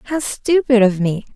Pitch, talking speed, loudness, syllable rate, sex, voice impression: 240 Hz, 175 wpm, -16 LUFS, 4.0 syllables/s, female, feminine, very adult-like, slightly dark, calm, slightly sweet